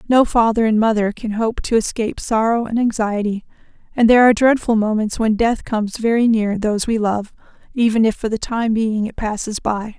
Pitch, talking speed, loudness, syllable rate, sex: 220 Hz, 200 wpm, -17 LUFS, 5.5 syllables/s, female